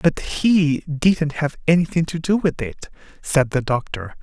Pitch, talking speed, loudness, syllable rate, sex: 155 Hz, 170 wpm, -20 LUFS, 4.0 syllables/s, male